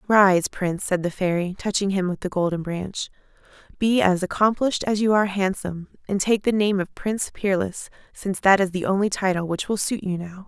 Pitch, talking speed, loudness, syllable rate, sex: 190 Hz, 205 wpm, -23 LUFS, 5.6 syllables/s, female